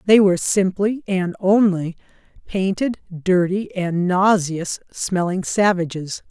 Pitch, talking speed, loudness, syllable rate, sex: 185 Hz, 105 wpm, -19 LUFS, 3.7 syllables/s, female